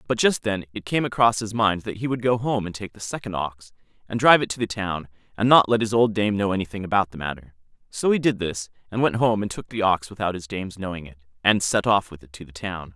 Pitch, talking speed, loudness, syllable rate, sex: 100 Hz, 275 wpm, -23 LUFS, 6.1 syllables/s, male